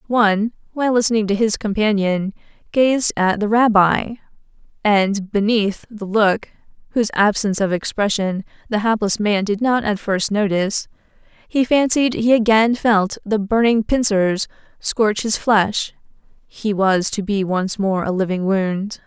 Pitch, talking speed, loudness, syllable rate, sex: 210 Hz, 140 wpm, -18 LUFS, 4.3 syllables/s, female